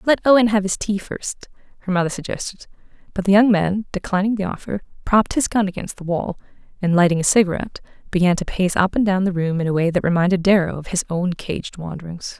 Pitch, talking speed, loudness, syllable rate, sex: 190 Hz, 220 wpm, -20 LUFS, 6.2 syllables/s, female